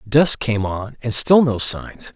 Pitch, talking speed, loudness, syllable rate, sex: 120 Hz, 195 wpm, -17 LUFS, 3.5 syllables/s, male